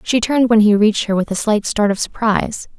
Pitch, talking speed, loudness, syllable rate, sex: 215 Hz, 260 wpm, -16 LUFS, 6.1 syllables/s, female